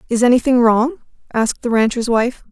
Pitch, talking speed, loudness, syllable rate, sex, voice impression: 240 Hz, 165 wpm, -16 LUFS, 5.9 syllables/s, female, very feminine, adult-like, slightly fluent, intellectual